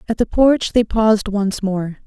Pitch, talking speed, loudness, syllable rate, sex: 210 Hz, 205 wpm, -17 LUFS, 4.4 syllables/s, female